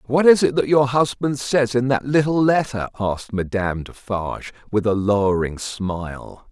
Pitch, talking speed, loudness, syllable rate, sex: 120 Hz, 165 wpm, -20 LUFS, 4.8 syllables/s, male